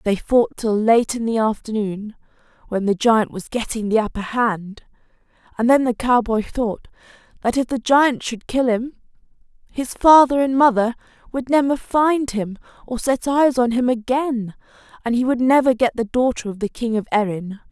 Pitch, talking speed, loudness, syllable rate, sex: 240 Hz, 180 wpm, -19 LUFS, 4.7 syllables/s, female